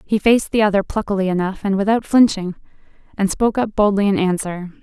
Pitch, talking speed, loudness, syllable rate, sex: 200 Hz, 185 wpm, -18 LUFS, 6.2 syllables/s, female